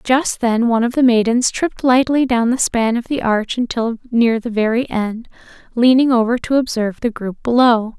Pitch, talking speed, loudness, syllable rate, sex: 235 Hz, 195 wpm, -16 LUFS, 5.0 syllables/s, female